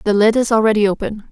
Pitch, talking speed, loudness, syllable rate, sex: 215 Hz, 230 wpm, -15 LUFS, 6.7 syllables/s, female